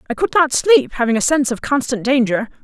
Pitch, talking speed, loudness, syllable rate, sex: 265 Hz, 230 wpm, -16 LUFS, 6.2 syllables/s, female